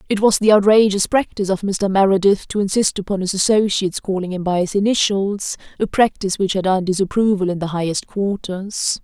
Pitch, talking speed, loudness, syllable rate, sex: 195 Hz, 185 wpm, -18 LUFS, 5.7 syllables/s, female